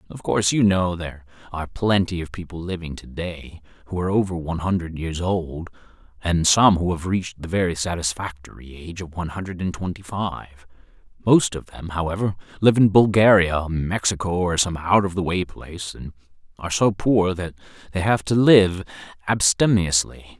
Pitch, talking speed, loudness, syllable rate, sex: 90 Hz, 175 wpm, -21 LUFS, 5.3 syllables/s, male